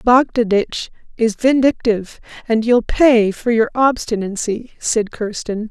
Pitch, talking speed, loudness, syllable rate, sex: 230 Hz, 115 wpm, -17 LUFS, 4.0 syllables/s, female